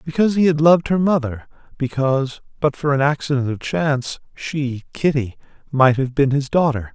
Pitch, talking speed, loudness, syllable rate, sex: 140 Hz, 175 wpm, -19 LUFS, 5.4 syllables/s, male